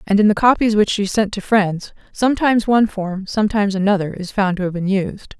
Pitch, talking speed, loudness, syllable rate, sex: 205 Hz, 220 wpm, -17 LUFS, 5.9 syllables/s, female